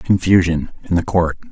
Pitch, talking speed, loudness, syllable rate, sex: 90 Hz, 160 wpm, -17 LUFS, 5.0 syllables/s, male